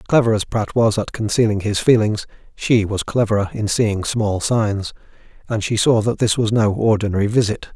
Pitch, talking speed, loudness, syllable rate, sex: 110 Hz, 185 wpm, -18 LUFS, 5.1 syllables/s, male